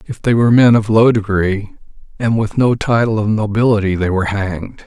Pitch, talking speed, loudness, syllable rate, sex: 110 Hz, 195 wpm, -14 LUFS, 5.6 syllables/s, male